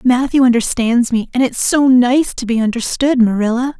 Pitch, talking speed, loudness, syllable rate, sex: 245 Hz, 175 wpm, -14 LUFS, 5.0 syllables/s, female